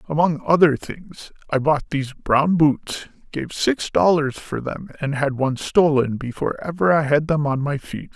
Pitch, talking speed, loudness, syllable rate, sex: 150 Hz, 170 wpm, -20 LUFS, 4.6 syllables/s, male